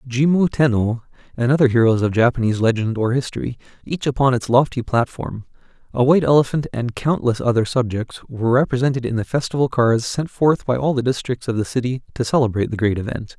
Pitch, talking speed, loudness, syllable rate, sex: 125 Hz, 190 wpm, -19 LUFS, 6.1 syllables/s, male